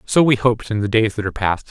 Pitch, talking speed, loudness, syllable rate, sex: 110 Hz, 315 wpm, -18 LUFS, 7.0 syllables/s, male